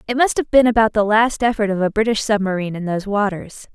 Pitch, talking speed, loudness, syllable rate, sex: 210 Hz, 240 wpm, -17 LUFS, 6.5 syllables/s, female